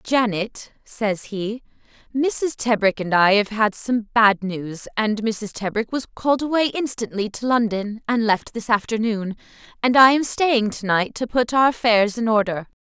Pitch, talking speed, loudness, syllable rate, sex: 225 Hz, 175 wpm, -20 LUFS, 4.3 syllables/s, female